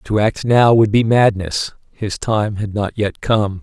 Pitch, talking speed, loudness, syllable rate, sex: 105 Hz, 200 wpm, -16 LUFS, 3.9 syllables/s, male